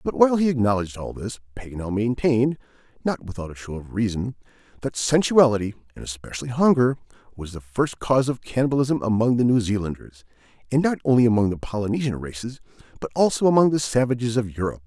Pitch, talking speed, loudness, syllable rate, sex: 120 Hz, 175 wpm, -22 LUFS, 6.6 syllables/s, male